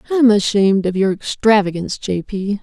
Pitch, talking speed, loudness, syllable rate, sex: 205 Hz, 160 wpm, -16 LUFS, 5.5 syllables/s, female